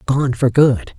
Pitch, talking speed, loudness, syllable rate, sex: 130 Hz, 185 wpm, -15 LUFS, 3.5 syllables/s, female